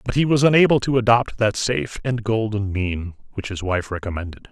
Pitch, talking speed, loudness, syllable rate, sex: 110 Hz, 200 wpm, -20 LUFS, 5.5 syllables/s, male